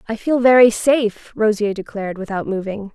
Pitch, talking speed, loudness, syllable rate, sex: 215 Hz, 165 wpm, -17 LUFS, 5.4 syllables/s, female